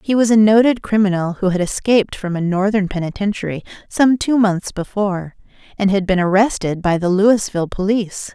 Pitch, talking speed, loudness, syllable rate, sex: 200 Hz, 170 wpm, -17 LUFS, 5.5 syllables/s, female